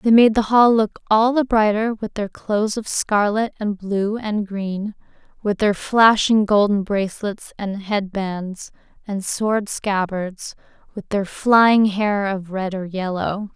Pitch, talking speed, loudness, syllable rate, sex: 205 Hz, 160 wpm, -19 LUFS, 3.8 syllables/s, female